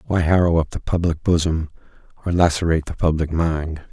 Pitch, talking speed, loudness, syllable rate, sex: 80 Hz, 170 wpm, -20 LUFS, 5.8 syllables/s, male